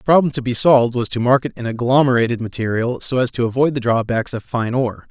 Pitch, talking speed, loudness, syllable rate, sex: 125 Hz, 235 wpm, -18 LUFS, 6.4 syllables/s, male